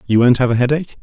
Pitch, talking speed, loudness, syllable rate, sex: 130 Hz, 295 wpm, -15 LUFS, 8.8 syllables/s, male